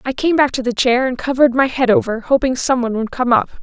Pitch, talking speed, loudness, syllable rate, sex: 255 Hz, 280 wpm, -16 LUFS, 6.3 syllables/s, female